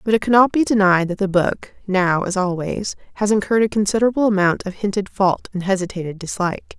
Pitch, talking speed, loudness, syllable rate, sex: 195 Hz, 195 wpm, -19 LUFS, 6.0 syllables/s, female